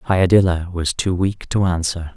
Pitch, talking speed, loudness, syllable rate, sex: 90 Hz, 165 wpm, -18 LUFS, 5.1 syllables/s, male